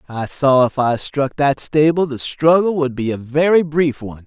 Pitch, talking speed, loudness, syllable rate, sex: 140 Hz, 210 wpm, -17 LUFS, 4.7 syllables/s, male